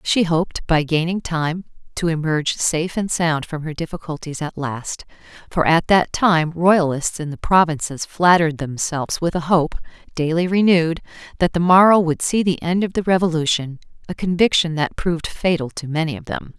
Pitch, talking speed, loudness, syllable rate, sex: 165 Hz, 175 wpm, -19 LUFS, 5.2 syllables/s, female